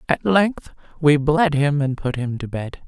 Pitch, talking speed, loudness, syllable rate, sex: 155 Hz, 210 wpm, -20 LUFS, 4.2 syllables/s, female